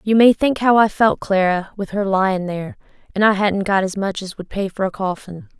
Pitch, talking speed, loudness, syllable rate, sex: 200 Hz, 245 wpm, -18 LUFS, 5.2 syllables/s, female